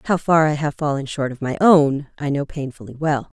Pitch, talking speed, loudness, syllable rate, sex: 145 Hz, 230 wpm, -19 LUFS, 5.3 syllables/s, female